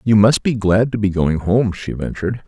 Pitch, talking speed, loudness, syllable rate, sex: 105 Hz, 240 wpm, -17 LUFS, 5.1 syllables/s, male